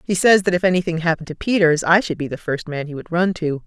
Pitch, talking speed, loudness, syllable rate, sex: 170 Hz, 295 wpm, -19 LUFS, 6.4 syllables/s, female